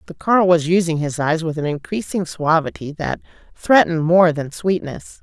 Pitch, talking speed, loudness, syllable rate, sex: 165 Hz, 170 wpm, -18 LUFS, 5.5 syllables/s, female